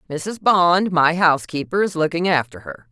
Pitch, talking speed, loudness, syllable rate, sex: 165 Hz, 165 wpm, -18 LUFS, 4.9 syllables/s, female